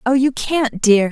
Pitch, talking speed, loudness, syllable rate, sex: 245 Hz, 215 wpm, -17 LUFS, 4.0 syllables/s, female